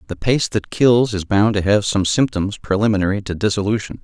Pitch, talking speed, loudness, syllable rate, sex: 105 Hz, 195 wpm, -18 LUFS, 5.5 syllables/s, male